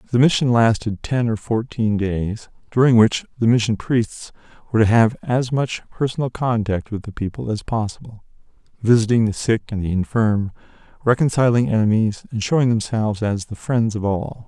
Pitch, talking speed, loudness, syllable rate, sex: 110 Hz, 165 wpm, -20 LUFS, 5.2 syllables/s, male